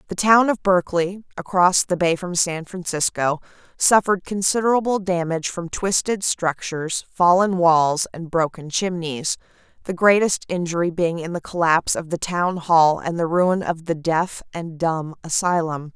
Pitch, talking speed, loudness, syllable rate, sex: 175 Hz, 155 wpm, -20 LUFS, 4.6 syllables/s, female